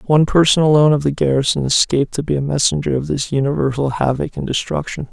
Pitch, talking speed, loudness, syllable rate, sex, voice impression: 140 Hz, 200 wpm, -16 LUFS, 6.7 syllables/s, male, very masculine, adult-like, slightly thick, slightly dark, slightly muffled, sincere, slightly calm, slightly unique